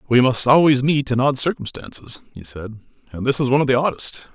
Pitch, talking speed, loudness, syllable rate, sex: 130 Hz, 220 wpm, -18 LUFS, 6.1 syllables/s, male